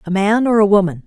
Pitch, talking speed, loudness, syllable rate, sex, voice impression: 200 Hz, 280 wpm, -14 LUFS, 6.3 syllables/s, female, feminine, very adult-like, slightly fluent, sincere, slightly calm, elegant